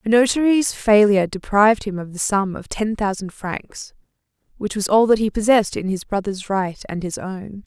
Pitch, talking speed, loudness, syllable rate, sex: 205 Hz, 195 wpm, -19 LUFS, 5.1 syllables/s, female